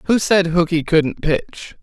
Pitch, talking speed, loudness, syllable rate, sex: 170 Hz, 165 wpm, -17 LUFS, 5.0 syllables/s, male